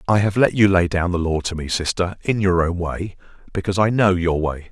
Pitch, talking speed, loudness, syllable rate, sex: 90 Hz, 255 wpm, -19 LUFS, 5.7 syllables/s, male